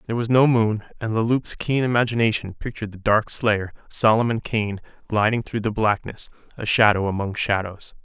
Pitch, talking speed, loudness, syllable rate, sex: 110 Hz, 170 wpm, -22 LUFS, 5.3 syllables/s, male